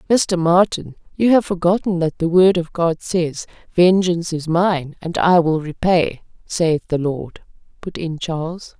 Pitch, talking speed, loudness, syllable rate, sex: 170 Hz, 165 wpm, -18 LUFS, 4.2 syllables/s, female